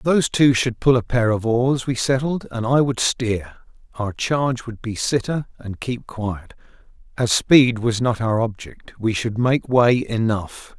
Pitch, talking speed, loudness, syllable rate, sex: 120 Hz, 185 wpm, -20 LUFS, 4.1 syllables/s, male